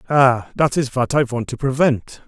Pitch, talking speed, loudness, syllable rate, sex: 130 Hz, 210 wpm, -18 LUFS, 4.5 syllables/s, male